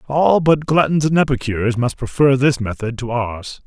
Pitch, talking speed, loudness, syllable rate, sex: 130 Hz, 180 wpm, -17 LUFS, 4.9 syllables/s, male